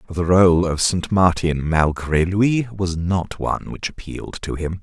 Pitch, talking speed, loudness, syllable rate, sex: 90 Hz, 175 wpm, -19 LUFS, 3.9 syllables/s, male